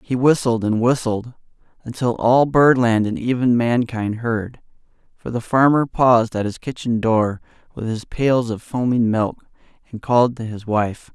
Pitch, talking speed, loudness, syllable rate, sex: 120 Hz, 160 wpm, -19 LUFS, 4.4 syllables/s, male